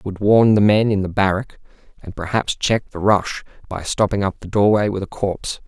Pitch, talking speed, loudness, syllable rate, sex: 100 Hz, 220 wpm, -18 LUFS, 5.5 syllables/s, male